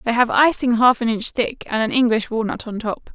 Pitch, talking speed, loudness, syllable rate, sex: 235 Hz, 250 wpm, -19 LUFS, 5.3 syllables/s, female